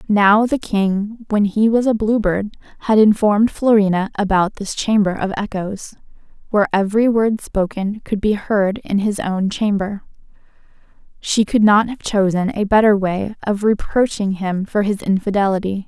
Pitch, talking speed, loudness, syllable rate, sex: 205 Hz, 160 wpm, -17 LUFS, 4.6 syllables/s, female